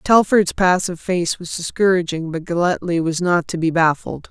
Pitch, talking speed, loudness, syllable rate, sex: 175 Hz, 165 wpm, -18 LUFS, 4.9 syllables/s, female